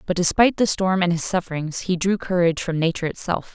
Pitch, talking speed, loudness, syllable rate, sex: 180 Hz, 220 wpm, -21 LUFS, 6.5 syllables/s, female